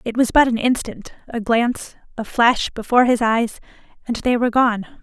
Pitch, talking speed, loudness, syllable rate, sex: 235 Hz, 190 wpm, -18 LUFS, 5.3 syllables/s, female